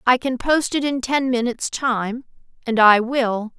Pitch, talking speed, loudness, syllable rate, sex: 245 Hz, 165 wpm, -19 LUFS, 4.3 syllables/s, female